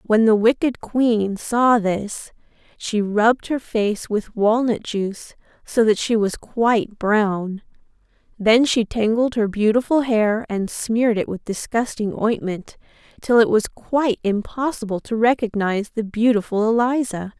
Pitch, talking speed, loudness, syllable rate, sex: 220 Hz, 140 wpm, -20 LUFS, 4.2 syllables/s, female